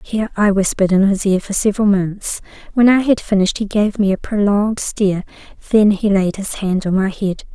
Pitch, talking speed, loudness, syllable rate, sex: 200 Hz, 215 wpm, -16 LUFS, 6.0 syllables/s, female